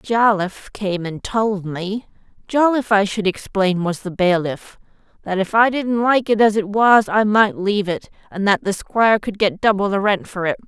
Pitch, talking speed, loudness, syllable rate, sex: 205 Hz, 190 wpm, -18 LUFS, 4.8 syllables/s, female